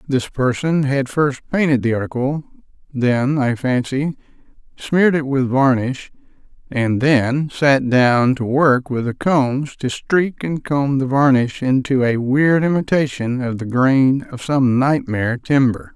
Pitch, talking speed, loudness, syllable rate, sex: 135 Hz, 150 wpm, -17 LUFS, 3.9 syllables/s, male